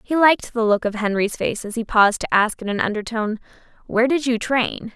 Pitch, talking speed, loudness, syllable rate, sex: 225 Hz, 230 wpm, -20 LUFS, 6.0 syllables/s, female